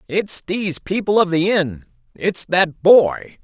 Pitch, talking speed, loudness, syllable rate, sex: 175 Hz, 140 wpm, -17 LUFS, 3.8 syllables/s, male